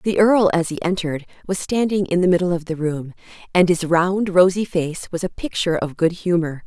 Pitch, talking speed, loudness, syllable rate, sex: 175 Hz, 215 wpm, -19 LUFS, 5.3 syllables/s, female